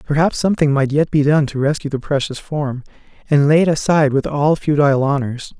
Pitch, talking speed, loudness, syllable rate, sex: 145 Hz, 205 wpm, -16 LUFS, 5.9 syllables/s, male